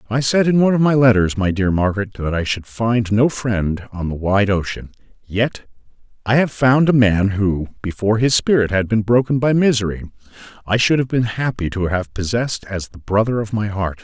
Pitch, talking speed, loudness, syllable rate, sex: 110 Hz, 210 wpm, -18 LUFS, 5.3 syllables/s, male